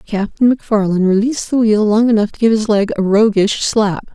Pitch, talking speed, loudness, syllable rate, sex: 215 Hz, 200 wpm, -14 LUFS, 5.3 syllables/s, female